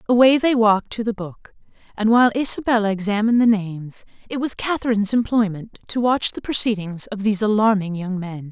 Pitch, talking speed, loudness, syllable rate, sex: 215 Hz, 175 wpm, -19 LUFS, 6.0 syllables/s, female